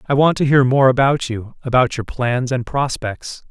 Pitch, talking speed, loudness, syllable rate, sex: 130 Hz, 190 wpm, -17 LUFS, 4.6 syllables/s, male